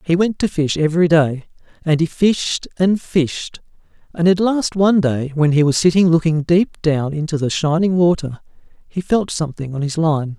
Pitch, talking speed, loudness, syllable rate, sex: 165 Hz, 190 wpm, -17 LUFS, 4.8 syllables/s, male